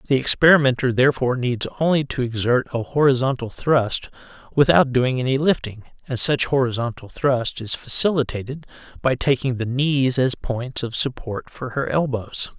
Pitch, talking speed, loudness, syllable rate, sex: 130 Hz, 150 wpm, -20 LUFS, 5.0 syllables/s, male